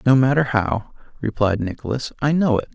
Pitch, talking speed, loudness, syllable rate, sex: 120 Hz, 175 wpm, -20 LUFS, 5.4 syllables/s, male